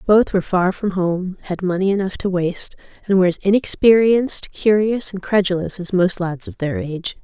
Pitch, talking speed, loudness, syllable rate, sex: 190 Hz, 190 wpm, -18 LUFS, 5.5 syllables/s, female